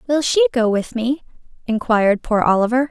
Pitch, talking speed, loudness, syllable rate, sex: 240 Hz, 165 wpm, -18 LUFS, 5.5 syllables/s, female